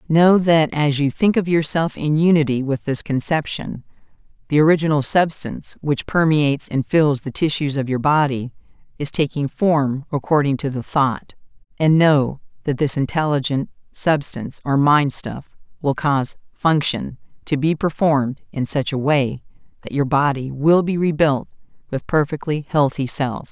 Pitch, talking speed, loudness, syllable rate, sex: 145 Hz, 155 wpm, -19 LUFS, 4.6 syllables/s, female